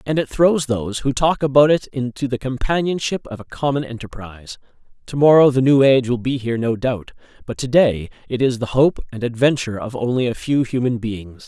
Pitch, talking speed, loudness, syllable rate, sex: 130 Hz, 205 wpm, -18 LUFS, 5.7 syllables/s, male